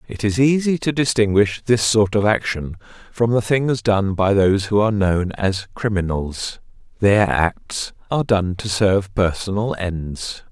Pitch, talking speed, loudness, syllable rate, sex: 105 Hz, 160 wpm, -19 LUFS, 4.3 syllables/s, male